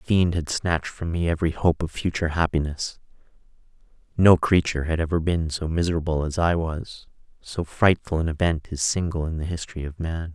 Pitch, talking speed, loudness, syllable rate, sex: 80 Hz, 185 wpm, -24 LUFS, 5.7 syllables/s, male